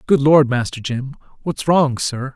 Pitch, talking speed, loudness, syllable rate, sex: 140 Hz, 180 wpm, -17 LUFS, 4.2 syllables/s, male